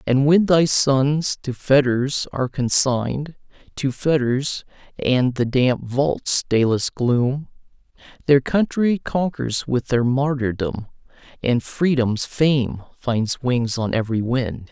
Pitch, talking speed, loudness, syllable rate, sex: 130 Hz, 120 wpm, -20 LUFS, 3.5 syllables/s, male